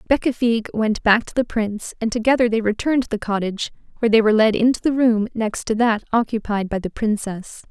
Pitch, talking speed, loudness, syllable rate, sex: 225 Hz, 210 wpm, -20 LUFS, 6.2 syllables/s, female